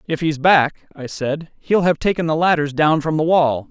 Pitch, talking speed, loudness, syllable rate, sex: 155 Hz, 225 wpm, -18 LUFS, 4.7 syllables/s, male